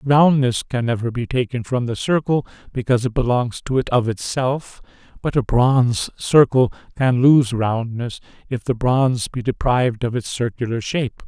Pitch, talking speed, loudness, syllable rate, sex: 125 Hz, 165 wpm, -19 LUFS, 4.9 syllables/s, male